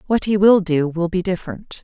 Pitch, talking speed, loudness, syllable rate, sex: 185 Hz, 230 wpm, -18 LUFS, 5.4 syllables/s, female